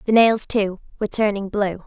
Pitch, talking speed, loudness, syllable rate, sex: 210 Hz, 195 wpm, -20 LUFS, 5.2 syllables/s, female